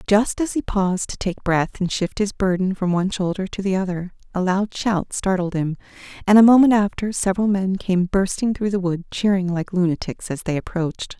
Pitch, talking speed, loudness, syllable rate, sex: 190 Hz, 210 wpm, -21 LUFS, 5.4 syllables/s, female